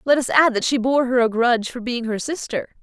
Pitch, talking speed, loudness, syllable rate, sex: 245 Hz, 275 wpm, -20 LUFS, 5.8 syllables/s, female